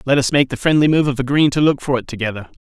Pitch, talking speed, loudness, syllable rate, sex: 135 Hz, 295 wpm, -16 LUFS, 7.0 syllables/s, male